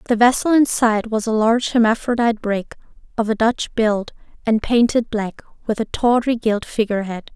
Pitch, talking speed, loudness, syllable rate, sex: 225 Hz, 180 wpm, -19 LUFS, 5.3 syllables/s, female